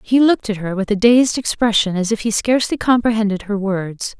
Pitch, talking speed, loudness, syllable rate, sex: 215 Hz, 215 wpm, -17 LUFS, 5.6 syllables/s, female